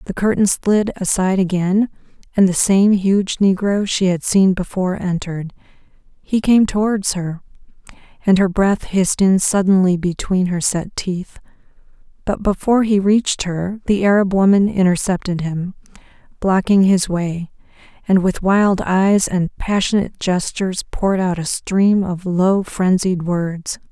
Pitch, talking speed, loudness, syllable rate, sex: 190 Hz, 145 wpm, -17 LUFS, 4.4 syllables/s, female